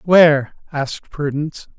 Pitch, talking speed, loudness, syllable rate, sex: 150 Hz, 100 wpm, -18 LUFS, 4.6 syllables/s, male